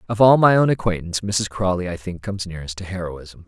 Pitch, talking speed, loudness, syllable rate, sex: 95 Hz, 225 wpm, -20 LUFS, 6.4 syllables/s, male